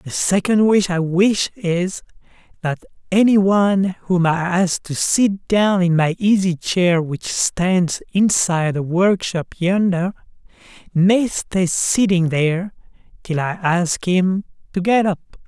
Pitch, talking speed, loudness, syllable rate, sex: 185 Hz, 140 wpm, -18 LUFS, 3.7 syllables/s, male